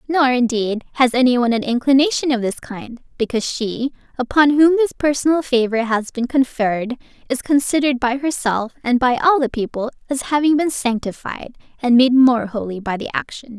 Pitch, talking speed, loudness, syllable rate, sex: 255 Hz, 175 wpm, -18 LUFS, 5.4 syllables/s, female